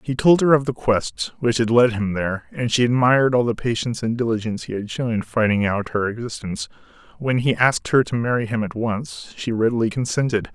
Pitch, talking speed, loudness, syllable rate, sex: 115 Hz, 220 wpm, -20 LUFS, 5.9 syllables/s, male